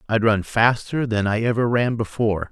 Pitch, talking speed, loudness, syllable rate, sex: 110 Hz, 190 wpm, -20 LUFS, 5.2 syllables/s, male